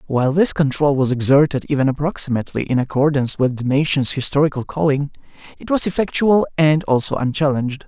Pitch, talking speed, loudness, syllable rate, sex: 140 Hz, 150 wpm, -17 LUFS, 6.2 syllables/s, male